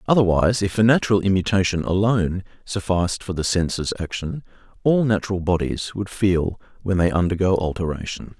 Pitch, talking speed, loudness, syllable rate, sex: 95 Hz, 145 wpm, -21 LUFS, 5.7 syllables/s, male